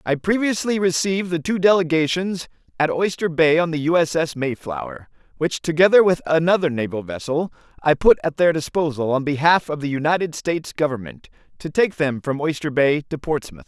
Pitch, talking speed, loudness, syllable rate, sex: 160 Hz, 180 wpm, -20 LUFS, 5.4 syllables/s, male